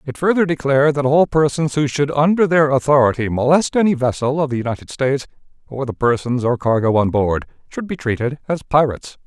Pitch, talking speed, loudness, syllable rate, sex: 140 Hz, 195 wpm, -17 LUFS, 5.9 syllables/s, male